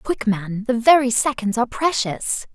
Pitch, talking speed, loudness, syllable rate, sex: 240 Hz, 165 wpm, -19 LUFS, 4.6 syllables/s, female